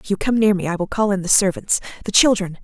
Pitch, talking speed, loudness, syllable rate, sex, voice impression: 200 Hz, 295 wpm, -18 LUFS, 6.6 syllables/s, female, feminine, adult-like, tensed, powerful, clear, very fluent, intellectual, elegant, lively, slightly strict, sharp